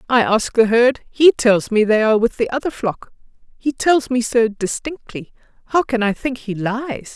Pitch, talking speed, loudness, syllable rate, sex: 235 Hz, 200 wpm, -17 LUFS, 4.6 syllables/s, female